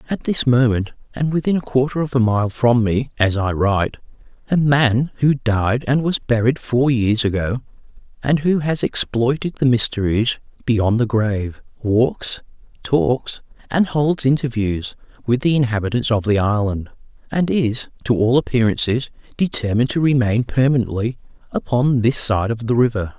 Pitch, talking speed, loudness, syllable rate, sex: 120 Hz, 155 wpm, -18 LUFS, 4.7 syllables/s, male